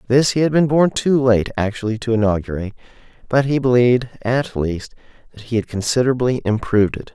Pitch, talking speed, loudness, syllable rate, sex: 120 Hz, 175 wpm, -18 LUFS, 6.0 syllables/s, male